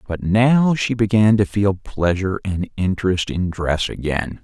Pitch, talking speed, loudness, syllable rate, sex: 100 Hz, 160 wpm, -19 LUFS, 4.3 syllables/s, male